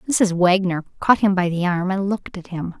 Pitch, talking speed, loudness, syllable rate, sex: 185 Hz, 235 wpm, -20 LUFS, 5.4 syllables/s, female